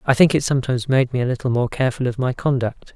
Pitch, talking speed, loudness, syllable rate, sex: 130 Hz, 265 wpm, -20 LUFS, 7.1 syllables/s, male